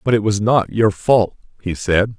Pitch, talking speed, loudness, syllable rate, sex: 105 Hz, 220 wpm, -17 LUFS, 4.3 syllables/s, male